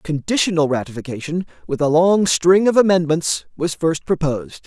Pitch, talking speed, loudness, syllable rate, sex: 160 Hz, 140 wpm, -18 LUFS, 5.1 syllables/s, male